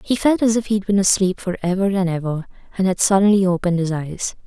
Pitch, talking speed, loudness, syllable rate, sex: 190 Hz, 230 wpm, -19 LUFS, 6.0 syllables/s, female